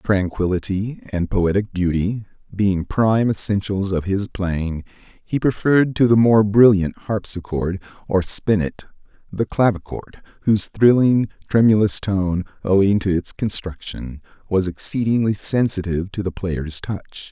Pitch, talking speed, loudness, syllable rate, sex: 100 Hz, 125 wpm, -19 LUFS, 4.4 syllables/s, male